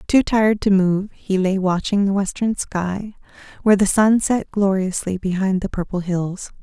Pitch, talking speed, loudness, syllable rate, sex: 195 Hz, 170 wpm, -19 LUFS, 4.6 syllables/s, female